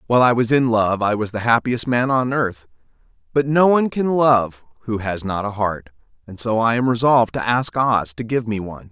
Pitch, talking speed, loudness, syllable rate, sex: 115 Hz, 230 wpm, -19 LUFS, 5.3 syllables/s, male